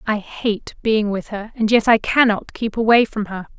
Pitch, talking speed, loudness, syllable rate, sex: 215 Hz, 215 wpm, -18 LUFS, 4.6 syllables/s, female